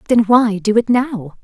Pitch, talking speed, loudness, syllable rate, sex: 220 Hz, 210 wpm, -15 LUFS, 4.1 syllables/s, female